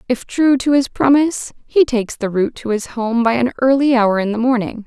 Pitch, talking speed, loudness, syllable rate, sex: 245 Hz, 235 wpm, -16 LUFS, 5.6 syllables/s, female